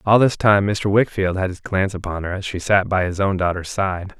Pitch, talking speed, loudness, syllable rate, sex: 95 Hz, 260 wpm, -19 LUFS, 5.4 syllables/s, male